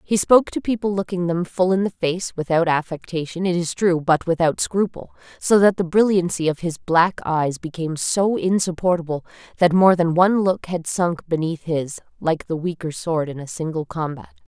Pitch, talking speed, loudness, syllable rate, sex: 170 Hz, 190 wpm, -20 LUFS, 5.1 syllables/s, female